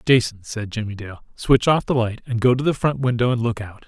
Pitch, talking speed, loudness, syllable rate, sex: 115 Hz, 265 wpm, -21 LUFS, 5.6 syllables/s, male